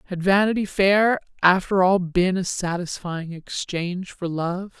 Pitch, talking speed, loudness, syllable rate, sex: 185 Hz, 140 wpm, -22 LUFS, 4.2 syllables/s, female